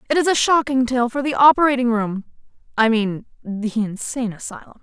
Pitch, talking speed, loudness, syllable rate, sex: 240 Hz, 160 wpm, -19 LUFS, 5.7 syllables/s, female